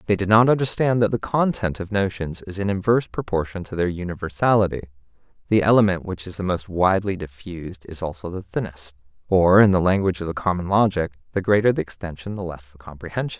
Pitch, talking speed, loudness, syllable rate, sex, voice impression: 95 Hz, 195 wpm, -21 LUFS, 6.3 syllables/s, male, masculine, adult-like, cool, sincere, slightly calm